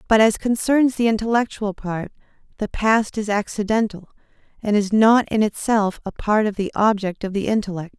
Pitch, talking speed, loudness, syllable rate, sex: 210 Hz, 175 wpm, -20 LUFS, 5.1 syllables/s, female